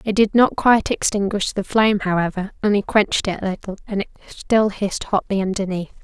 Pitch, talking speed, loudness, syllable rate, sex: 200 Hz, 170 wpm, -19 LUFS, 5.9 syllables/s, female